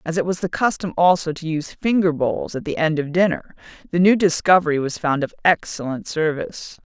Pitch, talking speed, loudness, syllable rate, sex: 165 Hz, 200 wpm, -20 LUFS, 5.6 syllables/s, female